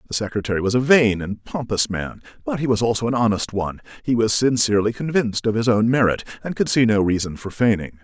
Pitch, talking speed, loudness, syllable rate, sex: 115 Hz, 225 wpm, -20 LUFS, 6.3 syllables/s, male